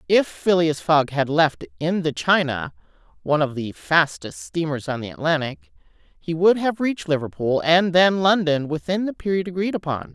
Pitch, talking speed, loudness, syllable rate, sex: 165 Hz, 170 wpm, -21 LUFS, 4.9 syllables/s, female